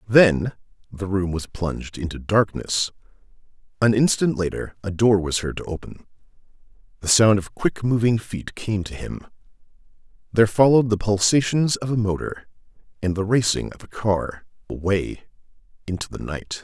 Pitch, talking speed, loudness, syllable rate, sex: 100 Hz, 150 wpm, -22 LUFS, 5.0 syllables/s, male